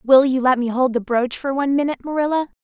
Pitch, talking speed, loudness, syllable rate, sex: 265 Hz, 250 wpm, -19 LUFS, 6.5 syllables/s, female